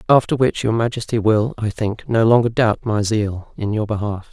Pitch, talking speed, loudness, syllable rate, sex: 110 Hz, 210 wpm, -19 LUFS, 5.0 syllables/s, male